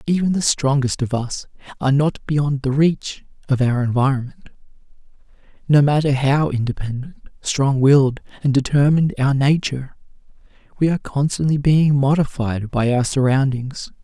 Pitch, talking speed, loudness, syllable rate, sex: 140 Hz, 130 wpm, -18 LUFS, 4.9 syllables/s, male